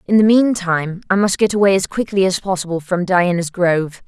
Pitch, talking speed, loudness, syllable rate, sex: 185 Hz, 205 wpm, -16 LUFS, 5.7 syllables/s, female